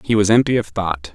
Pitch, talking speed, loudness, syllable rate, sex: 110 Hz, 260 wpm, -17 LUFS, 5.7 syllables/s, male